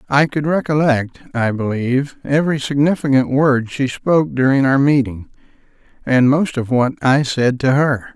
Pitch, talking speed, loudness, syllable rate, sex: 135 Hz, 155 wpm, -16 LUFS, 4.8 syllables/s, male